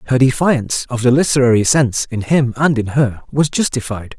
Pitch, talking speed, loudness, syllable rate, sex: 130 Hz, 185 wpm, -15 LUFS, 5.6 syllables/s, male